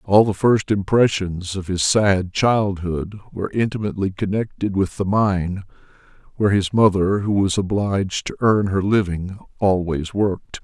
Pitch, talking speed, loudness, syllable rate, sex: 100 Hz, 145 wpm, -20 LUFS, 4.6 syllables/s, male